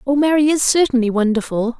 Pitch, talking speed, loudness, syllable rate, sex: 260 Hz, 170 wpm, -16 LUFS, 6.0 syllables/s, female